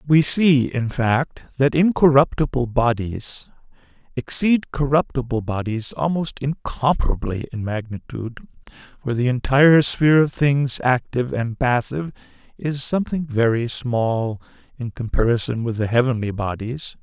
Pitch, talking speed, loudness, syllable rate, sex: 130 Hz, 115 wpm, -20 LUFS, 4.6 syllables/s, male